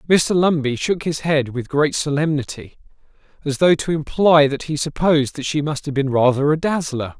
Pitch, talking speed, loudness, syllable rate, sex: 150 Hz, 185 wpm, -18 LUFS, 4.9 syllables/s, male